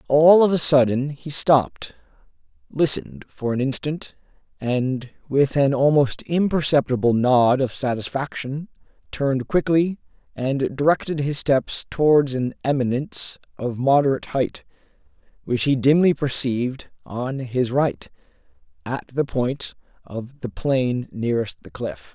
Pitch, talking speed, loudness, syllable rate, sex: 130 Hz, 125 wpm, -21 LUFS, 4.3 syllables/s, male